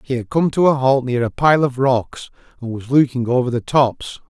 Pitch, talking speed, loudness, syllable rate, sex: 130 Hz, 235 wpm, -17 LUFS, 5.0 syllables/s, male